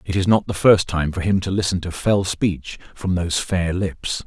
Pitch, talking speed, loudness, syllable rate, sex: 90 Hz, 240 wpm, -20 LUFS, 4.7 syllables/s, male